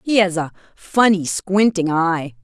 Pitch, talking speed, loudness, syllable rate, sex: 180 Hz, 150 wpm, -18 LUFS, 3.9 syllables/s, female